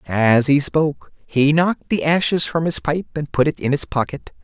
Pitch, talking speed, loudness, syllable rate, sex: 140 Hz, 215 wpm, -18 LUFS, 5.1 syllables/s, male